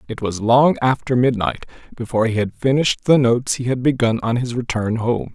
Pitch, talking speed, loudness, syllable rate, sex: 120 Hz, 200 wpm, -18 LUFS, 5.6 syllables/s, male